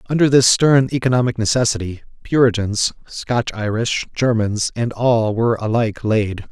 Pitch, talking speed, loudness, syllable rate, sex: 115 Hz, 130 wpm, -17 LUFS, 4.8 syllables/s, male